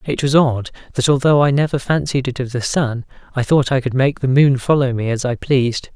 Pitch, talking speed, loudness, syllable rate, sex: 130 Hz, 240 wpm, -17 LUFS, 5.5 syllables/s, male